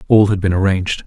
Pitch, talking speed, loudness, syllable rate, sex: 95 Hz, 225 wpm, -15 LUFS, 6.7 syllables/s, male